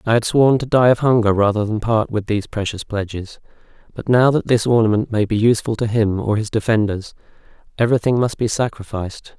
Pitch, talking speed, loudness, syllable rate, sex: 110 Hz, 200 wpm, -18 LUFS, 5.9 syllables/s, male